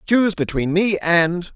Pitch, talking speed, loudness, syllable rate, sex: 185 Hz, 155 wpm, -18 LUFS, 4.2 syllables/s, male